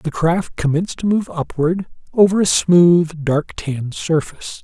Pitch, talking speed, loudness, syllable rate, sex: 165 Hz, 155 wpm, -17 LUFS, 4.2 syllables/s, male